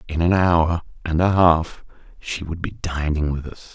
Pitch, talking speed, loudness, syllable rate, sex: 80 Hz, 190 wpm, -21 LUFS, 4.4 syllables/s, male